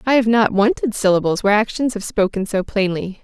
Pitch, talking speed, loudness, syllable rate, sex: 210 Hz, 205 wpm, -18 LUFS, 5.8 syllables/s, female